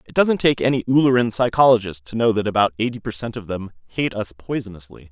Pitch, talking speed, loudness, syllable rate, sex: 115 Hz, 200 wpm, -20 LUFS, 6.1 syllables/s, male